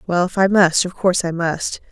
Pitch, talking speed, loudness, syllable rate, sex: 180 Hz, 250 wpm, -17 LUFS, 5.3 syllables/s, female